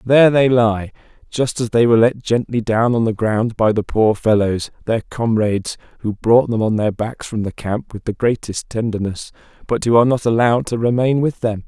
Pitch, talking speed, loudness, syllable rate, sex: 115 Hz, 210 wpm, -17 LUFS, 5.2 syllables/s, male